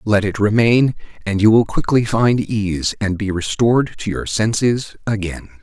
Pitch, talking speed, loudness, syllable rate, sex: 105 Hz, 170 wpm, -17 LUFS, 4.5 syllables/s, male